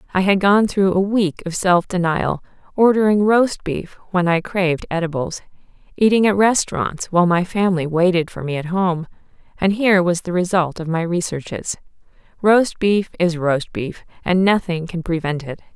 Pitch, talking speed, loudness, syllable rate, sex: 180 Hz, 170 wpm, -18 LUFS, 5.0 syllables/s, female